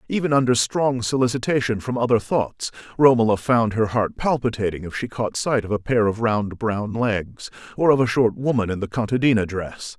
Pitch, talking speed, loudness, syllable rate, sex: 115 Hz, 190 wpm, -21 LUFS, 5.2 syllables/s, male